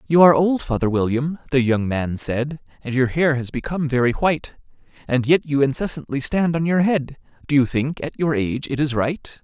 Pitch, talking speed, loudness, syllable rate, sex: 140 Hz, 210 wpm, -20 LUFS, 5.4 syllables/s, male